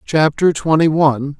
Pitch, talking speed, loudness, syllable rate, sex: 155 Hz, 130 wpm, -15 LUFS, 4.7 syllables/s, male